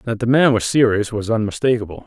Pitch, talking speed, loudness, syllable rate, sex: 115 Hz, 205 wpm, -17 LUFS, 5.9 syllables/s, male